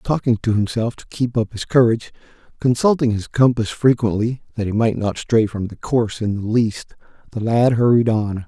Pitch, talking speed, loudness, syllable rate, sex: 115 Hz, 190 wpm, -19 LUFS, 5.2 syllables/s, male